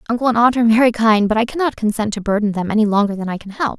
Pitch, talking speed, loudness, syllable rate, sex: 220 Hz, 300 wpm, -16 LUFS, 7.4 syllables/s, female